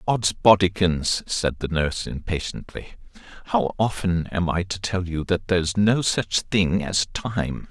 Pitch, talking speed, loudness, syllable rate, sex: 90 Hz, 155 wpm, -23 LUFS, 4.1 syllables/s, male